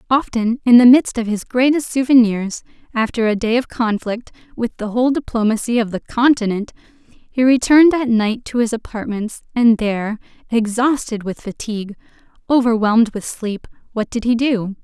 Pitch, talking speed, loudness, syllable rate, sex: 230 Hz, 160 wpm, -17 LUFS, 5.1 syllables/s, female